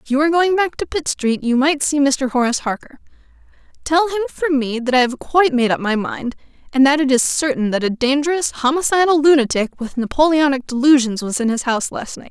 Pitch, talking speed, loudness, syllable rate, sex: 275 Hz, 220 wpm, -17 LUFS, 5.9 syllables/s, female